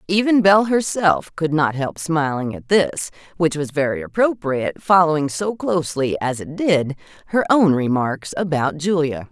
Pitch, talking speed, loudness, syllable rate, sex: 160 Hz, 155 wpm, -19 LUFS, 4.6 syllables/s, female